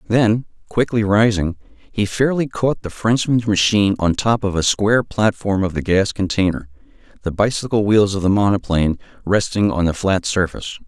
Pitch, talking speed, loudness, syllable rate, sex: 100 Hz, 165 wpm, -18 LUFS, 5.2 syllables/s, male